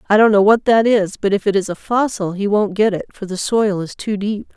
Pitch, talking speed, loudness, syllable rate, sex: 205 Hz, 290 wpm, -17 LUFS, 5.4 syllables/s, female